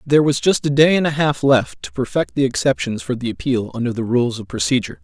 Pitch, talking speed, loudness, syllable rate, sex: 135 Hz, 250 wpm, -18 LUFS, 6.1 syllables/s, male